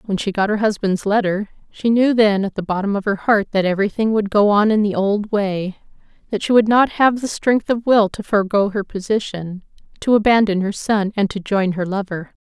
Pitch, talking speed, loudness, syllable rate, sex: 205 Hz, 220 wpm, -18 LUFS, 5.4 syllables/s, female